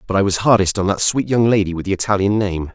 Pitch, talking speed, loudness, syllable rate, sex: 100 Hz, 285 wpm, -17 LUFS, 6.5 syllables/s, male